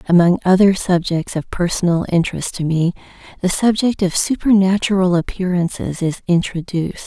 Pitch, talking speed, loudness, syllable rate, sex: 180 Hz, 125 wpm, -17 LUFS, 5.3 syllables/s, female